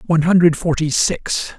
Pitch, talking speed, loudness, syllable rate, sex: 165 Hz, 150 wpm, -16 LUFS, 5.0 syllables/s, male